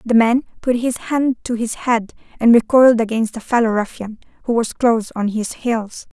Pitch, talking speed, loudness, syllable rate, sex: 230 Hz, 195 wpm, -17 LUFS, 5.0 syllables/s, female